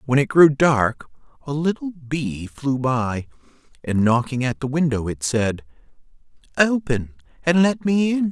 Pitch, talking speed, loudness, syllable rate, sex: 140 Hz, 150 wpm, -20 LUFS, 4.2 syllables/s, male